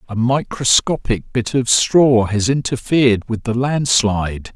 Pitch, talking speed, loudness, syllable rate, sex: 120 Hz, 130 wpm, -16 LUFS, 4.2 syllables/s, male